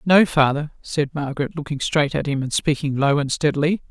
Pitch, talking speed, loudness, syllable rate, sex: 150 Hz, 200 wpm, -21 LUFS, 5.6 syllables/s, female